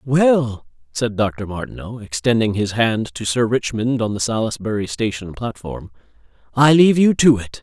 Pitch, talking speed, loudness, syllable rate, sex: 115 Hz, 155 wpm, -18 LUFS, 4.7 syllables/s, male